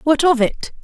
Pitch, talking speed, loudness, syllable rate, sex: 285 Hz, 215 wpm, -16 LUFS, 4.6 syllables/s, female